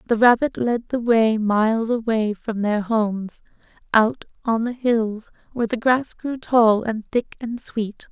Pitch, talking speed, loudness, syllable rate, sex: 225 Hz, 170 wpm, -21 LUFS, 4.0 syllables/s, female